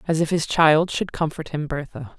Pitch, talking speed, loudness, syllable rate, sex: 155 Hz, 220 wpm, -21 LUFS, 5.0 syllables/s, female